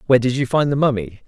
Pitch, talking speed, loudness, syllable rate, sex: 135 Hz, 280 wpm, -18 LUFS, 7.3 syllables/s, male